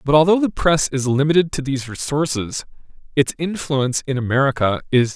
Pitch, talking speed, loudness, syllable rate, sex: 140 Hz, 175 wpm, -19 LUFS, 6.2 syllables/s, male